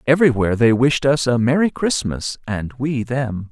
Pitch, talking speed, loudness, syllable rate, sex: 130 Hz, 170 wpm, -18 LUFS, 4.9 syllables/s, male